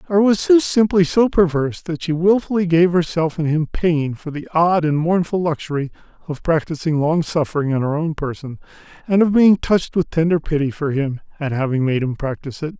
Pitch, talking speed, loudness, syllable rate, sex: 165 Hz, 200 wpm, -18 LUFS, 5.5 syllables/s, male